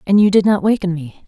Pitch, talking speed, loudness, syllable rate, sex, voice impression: 190 Hz, 285 wpm, -15 LUFS, 7.0 syllables/s, female, very feminine, adult-like, slightly soft, calm, sweet